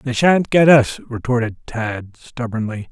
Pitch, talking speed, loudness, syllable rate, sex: 120 Hz, 145 wpm, -17 LUFS, 4.0 syllables/s, male